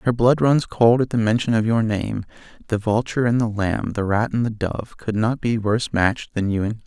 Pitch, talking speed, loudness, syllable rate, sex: 110 Hz, 255 wpm, -21 LUFS, 5.5 syllables/s, male